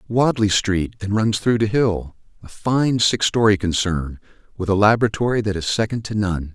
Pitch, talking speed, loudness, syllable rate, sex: 105 Hz, 175 wpm, -19 LUFS, 4.9 syllables/s, male